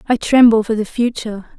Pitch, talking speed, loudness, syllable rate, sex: 225 Hz, 190 wpm, -14 LUFS, 5.7 syllables/s, female